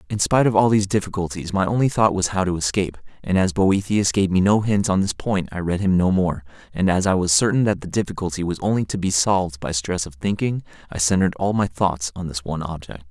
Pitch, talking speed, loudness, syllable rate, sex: 95 Hz, 245 wpm, -21 LUFS, 6.1 syllables/s, male